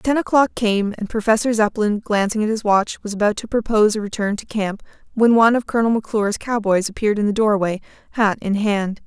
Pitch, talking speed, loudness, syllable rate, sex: 215 Hz, 205 wpm, -19 LUFS, 6.1 syllables/s, female